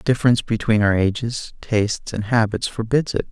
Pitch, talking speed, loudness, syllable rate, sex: 110 Hz, 180 wpm, -20 LUFS, 5.8 syllables/s, male